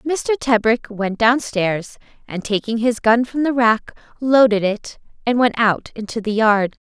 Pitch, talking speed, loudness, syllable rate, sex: 230 Hz, 165 wpm, -18 LUFS, 4.2 syllables/s, female